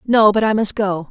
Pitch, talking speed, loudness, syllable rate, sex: 205 Hz, 270 wpm, -16 LUFS, 5.0 syllables/s, female